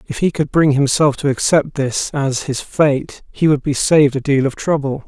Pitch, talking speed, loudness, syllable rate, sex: 140 Hz, 225 wpm, -16 LUFS, 4.8 syllables/s, male